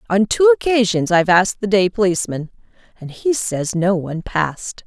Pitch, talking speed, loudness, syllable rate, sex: 190 Hz, 175 wpm, -17 LUFS, 5.7 syllables/s, female